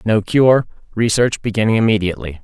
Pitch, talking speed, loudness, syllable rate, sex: 110 Hz, 125 wpm, -16 LUFS, 5.8 syllables/s, male